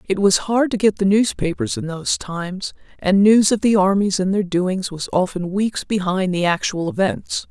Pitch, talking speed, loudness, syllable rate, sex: 195 Hz, 200 wpm, -19 LUFS, 4.8 syllables/s, female